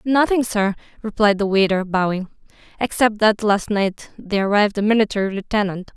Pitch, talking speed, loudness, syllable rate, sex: 205 Hz, 150 wpm, -19 LUFS, 5.6 syllables/s, female